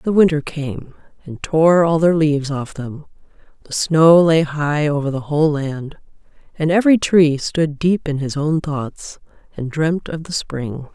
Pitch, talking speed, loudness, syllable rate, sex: 155 Hz, 175 wpm, -17 LUFS, 4.2 syllables/s, female